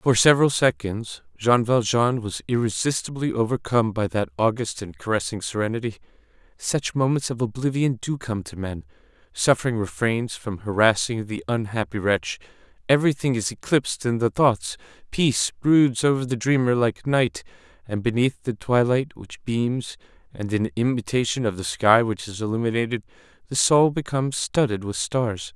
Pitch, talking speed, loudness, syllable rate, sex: 115 Hz, 150 wpm, -23 LUFS, 5.1 syllables/s, male